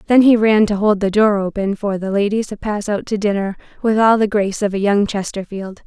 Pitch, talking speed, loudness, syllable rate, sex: 205 Hz, 245 wpm, -17 LUFS, 5.5 syllables/s, female